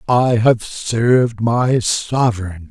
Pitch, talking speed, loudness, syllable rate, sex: 115 Hz, 110 wpm, -16 LUFS, 3.1 syllables/s, male